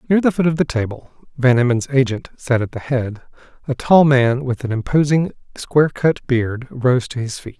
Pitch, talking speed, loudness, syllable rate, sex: 130 Hz, 190 wpm, -18 LUFS, 5.1 syllables/s, male